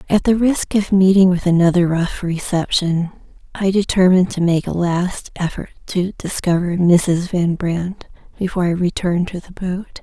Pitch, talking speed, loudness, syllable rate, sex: 180 Hz, 160 wpm, -17 LUFS, 4.7 syllables/s, female